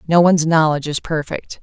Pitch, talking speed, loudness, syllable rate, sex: 160 Hz, 185 wpm, -16 LUFS, 6.1 syllables/s, female